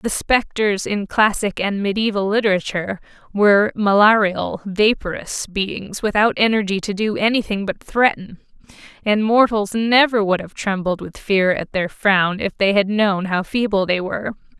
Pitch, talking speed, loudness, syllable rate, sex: 205 Hz, 150 wpm, -18 LUFS, 4.6 syllables/s, female